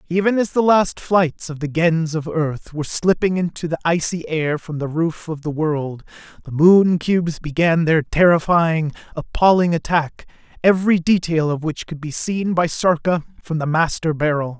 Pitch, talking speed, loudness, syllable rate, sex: 165 Hz, 175 wpm, -19 LUFS, 4.7 syllables/s, male